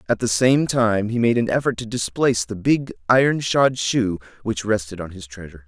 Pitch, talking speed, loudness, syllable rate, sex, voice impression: 110 Hz, 210 wpm, -20 LUFS, 5.3 syllables/s, male, masculine, middle-aged, tensed, powerful, slightly hard, fluent, intellectual, slightly mature, wild, lively, slightly strict, slightly sharp